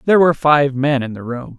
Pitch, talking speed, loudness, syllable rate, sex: 140 Hz, 265 wpm, -15 LUFS, 6.2 syllables/s, male